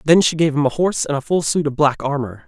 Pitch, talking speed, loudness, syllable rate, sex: 145 Hz, 315 wpm, -18 LUFS, 6.5 syllables/s, male